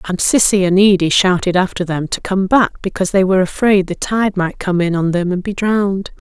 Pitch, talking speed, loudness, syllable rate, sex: 190 Hz, 230 wpm, -15 LUFS, 5.4 syllables/s, female